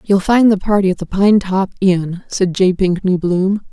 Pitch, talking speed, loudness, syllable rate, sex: 190 Hz, 195 wpm, -15 LUFS, 4.7 syllables/s, female